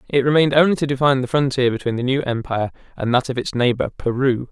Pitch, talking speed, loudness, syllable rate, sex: 130 Hz, 225 wpm, -19 LUFS, 7.0 syllables/s, male